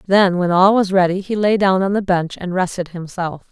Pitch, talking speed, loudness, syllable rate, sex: 185 Hz, 240 wpm, -17 LUFS, 5.1 syllables/s, female